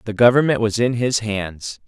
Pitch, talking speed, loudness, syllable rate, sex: 115 Hz, 190 wpm, -18 LUFS, 4.7 syllables/s, male